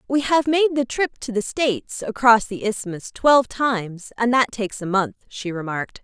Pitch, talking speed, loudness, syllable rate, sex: 230 Hz, 200 wpm, -21 LUFS, 5.1 syllables/s, female